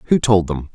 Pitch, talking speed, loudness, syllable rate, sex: 100 Hz, 245 wpm, -17 LUFS, 5.9 syllables/s, male